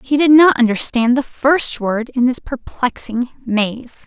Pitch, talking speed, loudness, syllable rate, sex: 250 Hz, 160 wpm, -16 LUFS, 3.8 syllables/s, female